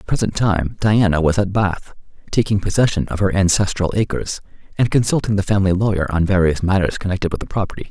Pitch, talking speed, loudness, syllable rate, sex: 95 Hz, 195 wpm, -18 LUFS, 6.4 syllables/s, male